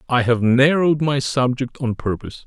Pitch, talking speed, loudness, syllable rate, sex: 130 Hz, 170 wpm, -19 LUFS, 5.2 syllables/s, male